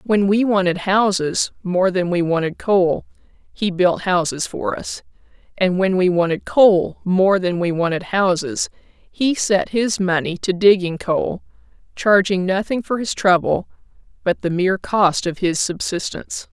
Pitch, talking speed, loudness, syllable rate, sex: 185 Hz, 155 wpm, -18 LUFS, 4.2 syllables/s, female